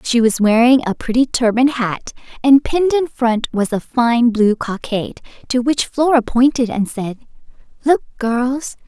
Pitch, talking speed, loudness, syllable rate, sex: 245 Hz, 160 wpm, -16 LUFS, 4.5 syllables/s, female